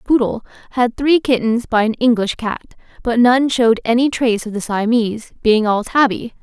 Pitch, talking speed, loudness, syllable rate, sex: 235 Hz, 175 wpm, -16 LUFS, 5.2 syllables/s, female